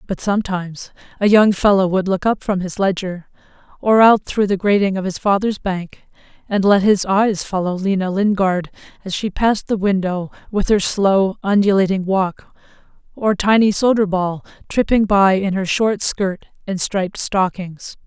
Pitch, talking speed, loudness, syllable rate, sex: 195 Hz, 165 wpm, -17 LUFS, 4.7 syllables/s, female